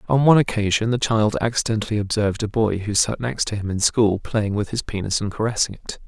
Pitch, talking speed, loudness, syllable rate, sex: 110 Hz, 225 wpm, -21 LUFS, 6.2 syllables/s, male